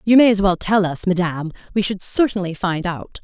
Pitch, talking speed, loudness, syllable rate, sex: 190 Hz, 225 wpm, -19 LUFS, 5.6 syllables/s, female